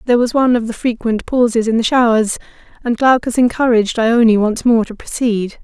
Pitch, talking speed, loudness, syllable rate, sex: 230 Hz, 190 wpm, -15 LUFS, 5.6 syllables/s, female